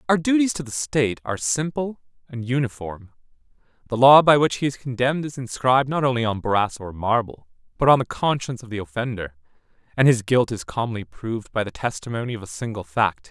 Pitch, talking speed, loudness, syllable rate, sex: 120 Hz, 200 wpm, -22 LUFS, 6.0 syllables/s, male